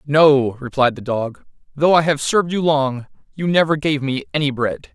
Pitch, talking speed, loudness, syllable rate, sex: 145 Hz, 195 wpm, -18 LUFS, 4.9 syllables/s, male